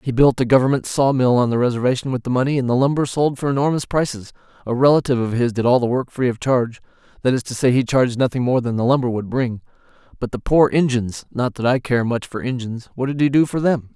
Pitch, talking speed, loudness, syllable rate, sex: 125 Hz, 240 wpm, -19 LUFS, 6.4 syllables/s, male